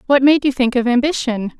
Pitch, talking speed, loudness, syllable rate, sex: 255 Hz, 225 wpm, -16 LUFS, 5.7 syllables/s, female